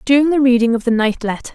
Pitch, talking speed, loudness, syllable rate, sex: 245 Hz, 275 wpm, -15 LUFS, 6.9 syllables/s, female